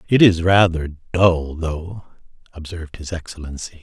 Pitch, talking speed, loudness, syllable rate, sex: 85 Hz, 125 wpm, -19 LUFS, 4.8 syllables/s, male